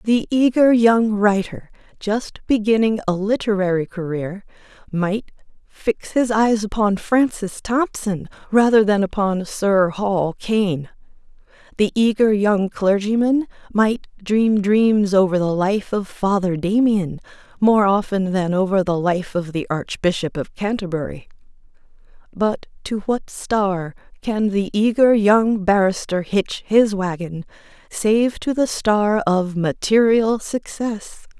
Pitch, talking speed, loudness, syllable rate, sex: 205 Hz, 125 wpm, -19 LUFS, 3.8 syllables/s, female